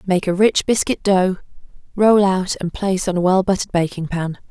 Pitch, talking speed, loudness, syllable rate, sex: 185 Hz, 200 wpm, -18 LUFS, 5.3 syllables/s, female